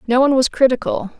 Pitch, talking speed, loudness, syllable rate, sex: 255 Hz, 200 wpm, -16 LUFS, 7.1 syllables/s, female